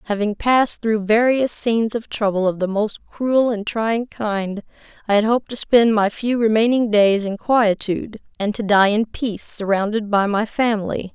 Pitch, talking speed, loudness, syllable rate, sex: 215 Hz, 185 wpm, -19 LUFS, 4.8 syllables/s, female